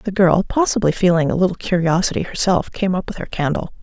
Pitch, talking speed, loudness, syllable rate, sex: 185 Hz, 205 wpm, -18 LUFS, 6.0 syllables/s, female